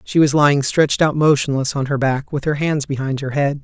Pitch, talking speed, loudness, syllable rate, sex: 140 Hz, 250 wpm, -17 LUFS, 5.7 syllables/s, male